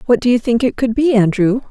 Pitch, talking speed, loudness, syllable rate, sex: 235 Hz, 280 wpm, -15 LUFS, 6.0 syllables/s, female